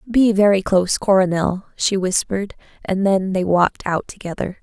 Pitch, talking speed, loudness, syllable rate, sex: 190 Hz, 155 wpm, -18 LUFS, 5.2 syllables/s, female